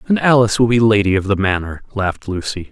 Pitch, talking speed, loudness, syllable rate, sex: 105 Hz, 220 wpm, -16 LUFS, 6.5 syllables/s, male